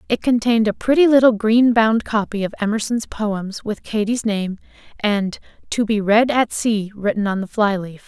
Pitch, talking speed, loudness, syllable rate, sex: 215 Hz, 180 wpm, -18 LUFS, 4.8 syllables/s, female